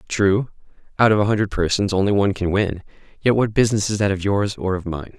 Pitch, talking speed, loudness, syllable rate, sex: 100 Hz, 230 wpm, -20 LUFS, 6.3 syllables/s, male